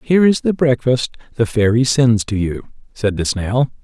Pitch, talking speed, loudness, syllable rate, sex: 120 Hz, 190 wpm, -17 LUFS, 4.7 syllables/s, male